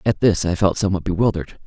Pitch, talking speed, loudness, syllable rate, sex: 95 Hz, 215 wpm, -19 LUFS, 7.2 syllables/s, male